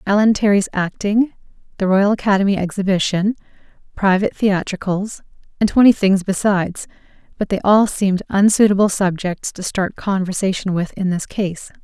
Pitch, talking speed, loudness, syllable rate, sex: 195 Hz, 130 wpm, -17 LUFS, 5.2 syllables/s, female